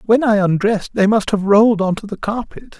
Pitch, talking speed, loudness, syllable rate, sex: 210 Hz, 235 wpm, -16 LUFS, 6.1 syllables/s, male